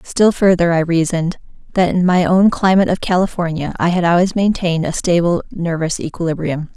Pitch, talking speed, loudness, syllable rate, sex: 175 Hz, 170 wpm, -16 LUFS, 5.7 syllables/s, female